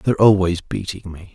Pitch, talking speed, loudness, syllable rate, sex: 95 Hz, 180 wpm, -18 LUFS, 5.3 syllables/s, male